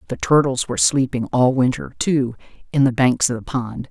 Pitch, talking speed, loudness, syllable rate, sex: 120 Hz, 200 wpm, -19 LUFS, 5.2 syllables/s, female